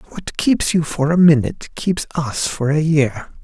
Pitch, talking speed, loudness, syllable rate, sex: 150 Hz, 190 wpm, -17 LUFS, 4.3 syllables/s, male